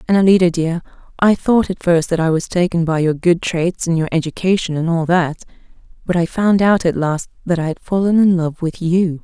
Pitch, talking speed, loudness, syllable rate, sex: 175 Hz, 225 wpm, -16 LUFS, 5.3 syllables/s, female